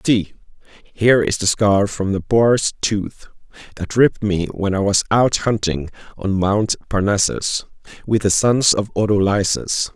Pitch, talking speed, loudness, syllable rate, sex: 105 Hz, 150 wpm, -18 LUFS, 4.2 syllables/s, male